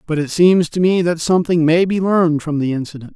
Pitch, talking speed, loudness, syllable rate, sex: 165 Hz, 245 wpm, -16 LUFS, 6.0 syllables/s, male